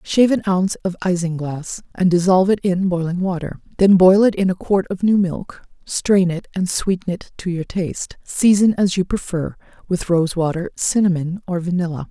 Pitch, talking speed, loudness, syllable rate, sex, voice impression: 180 Hz, 190 wpm, -18 LUFS, 5.1 syllables/s, female, very feminine, middle-aged, very thin, relaxed, slightly weak, slightly dark, very soft, slightly clear, fluent, cute, very intellectual, refreshing, very sincere, calm, very friendly, reassuring, unique, very elegant, slightly wild, sweet, slightly lively, kind, slightly intense, slightly modest